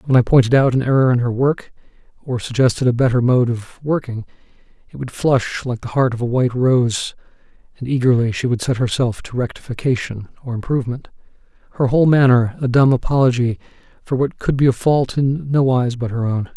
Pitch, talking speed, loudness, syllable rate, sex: 125 Hz, 195 wpm, -17 LUFS, 5.7 syllables/s, male